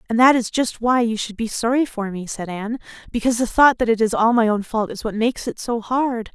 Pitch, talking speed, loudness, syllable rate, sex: 230 Hz, 275 wpm, -20 LUFS, 5.8 syllables/s, female